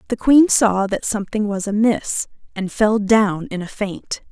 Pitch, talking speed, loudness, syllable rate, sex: 210 Hz, 180 wpm, -18 LUFS, 4.2 syllables/s, female